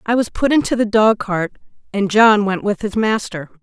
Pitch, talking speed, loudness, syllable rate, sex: 210 Hz, 215 wpm, -16 LUFS, 4.9 syllables/s, female